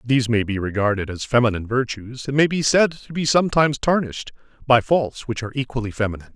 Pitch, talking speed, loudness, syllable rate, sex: 125 Hz, 200 wpm, -20 LUFS, 6.7 syllables/s, male